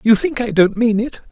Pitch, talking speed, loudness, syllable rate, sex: 225 Hz, 275 wpm, -16 LUFS, 5.2 syllables/s, male